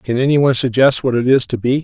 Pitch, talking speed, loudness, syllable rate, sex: 125 Hz, 295 wpm, -14 LUFS, 6.5 syllables/s, male